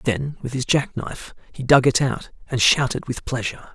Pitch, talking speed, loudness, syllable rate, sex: 130 Hz, 210 wpm, -21 LUFS, 5.3 syllables/s, male